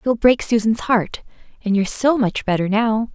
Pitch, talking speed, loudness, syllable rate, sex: 220 Hz, 190 wpm, -18 LUFS, 4.9 syllables/s, female